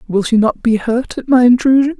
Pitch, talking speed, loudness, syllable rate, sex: 240 Hz, 240 wpm, -13 LUFS, 5.5 syllables/s, female